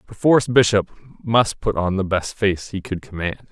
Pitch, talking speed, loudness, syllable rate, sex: 100 Hz, 190 wpm, -20 LUFS, 5.0 syllables/s, male